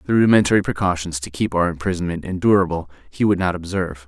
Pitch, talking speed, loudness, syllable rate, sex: 90 Hz, 175 wpm, -20 LUFS, 7.0 syllables/s, male